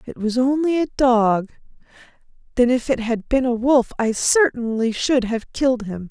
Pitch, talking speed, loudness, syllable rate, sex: 245 Hz, 175 wpm, -19 LUFS, 4.5 syllables/s, female